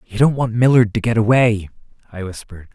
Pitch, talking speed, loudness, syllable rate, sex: 110 Hz, 195 wpm, -16 LUFS, 5.9 syllables/s, male